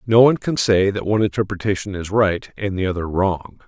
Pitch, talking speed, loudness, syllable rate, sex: 100 Hz, 210 wpm, -19 LUFS, 5.8 syllables/s, male